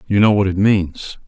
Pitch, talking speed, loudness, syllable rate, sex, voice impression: 100 Hz, 235 wpm, -15 LUFS, 4.6 syllables/s, male, very masculine, very adult-like, old, very thick, very tensed, very powerful, slightly bright, soft, muffled, very fluent, raspy, very cool, intellectual, sincere, very calm, very mature, very friendly, very reassuring, very unique, elegant, very wild, sweet, lively, very kind, slightly intense